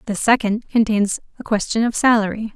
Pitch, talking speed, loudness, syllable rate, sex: 220 Hz, 165 wpm, -19 LUFS, 5.4 syllables/s, female